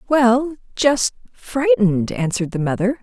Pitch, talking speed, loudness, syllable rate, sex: 235 Hz, 100 wpm, -18 LUFS, 4.5 syllables/s, female